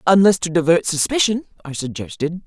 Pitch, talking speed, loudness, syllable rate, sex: 170 Hz, 145 wpm, -18 LUFS, 5.7 syllables/s, female